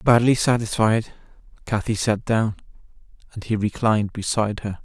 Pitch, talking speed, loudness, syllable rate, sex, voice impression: 110 Hz, 125 wpm, -22 LUFS, 5.1 syllables/s, male, very masculine, very adult-like, thick, relaxed, weak, dark, slightly soft, slightly muffled, slightly fluent, cool, intellectual, slightly refreshing, very sincere, very calm, mature, friendly, slightly reassuring, unique, very elegant, very sweet, slightly lively, very kind, very modest